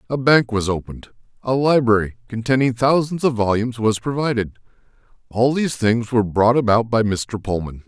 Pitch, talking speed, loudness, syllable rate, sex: 115 Hz, 160 wpm, -19 LUFS, 5.6 syllables/s, male